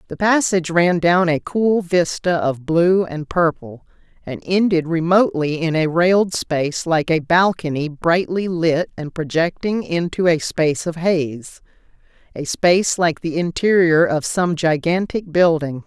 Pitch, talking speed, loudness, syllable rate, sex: 170 Hz, 145 wpm, -18 LUFS, 4.3 syllables/s, female